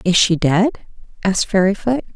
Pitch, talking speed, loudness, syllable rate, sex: 200 Hz, 140 wpm, -17 LUFS, 5.6 syllables/s, female